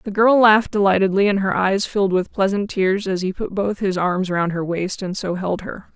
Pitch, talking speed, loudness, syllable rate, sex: 195 Hz, 240 wpm, -19 LUFS, 5.1 syllables/s, female